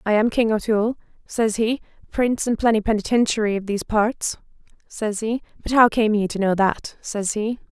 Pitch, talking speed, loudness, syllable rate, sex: 220 Hz, 180 wpm, -21 LUFS, 5.3 syllables/s, female